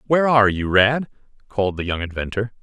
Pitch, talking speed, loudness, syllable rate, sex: 110 Hz, 185 wpm, -19 LUFS, 6.4 syllables/s, male